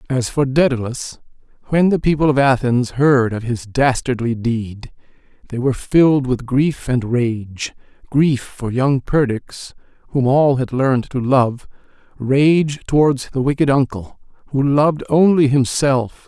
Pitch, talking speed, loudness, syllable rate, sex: 130 Hz, 140 wpm, -17 LUFS, 4.1 syllables/s, male